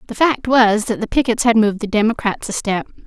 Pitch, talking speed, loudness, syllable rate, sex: 220 Hz, 235 wpm, -17 LUFS, 5.9 syllables/s, female